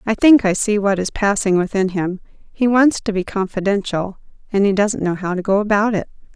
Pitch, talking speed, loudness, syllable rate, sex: 200 Hz, 225 wpm, -17 LUFS, 5.4 syllables/s, female